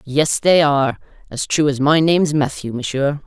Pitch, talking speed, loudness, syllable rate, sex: 145 Hz, 185 wpm, -17 LUFS, 5.0 syllables/s, female